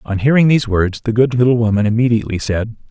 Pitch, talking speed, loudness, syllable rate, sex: 115 Hz, 205 wpm, -15 LUFS, 6.7 syllables/s, male